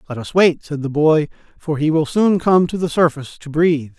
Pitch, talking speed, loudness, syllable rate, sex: 155 Hz, 240 wpm, -17 LUFS, 5.5 syllables/s, male